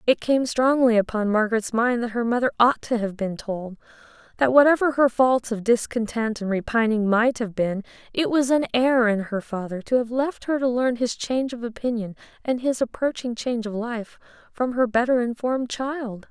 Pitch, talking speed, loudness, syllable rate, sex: 235 Hz, 195 wpm, -23 LUFS, 5.2 syllables/s, female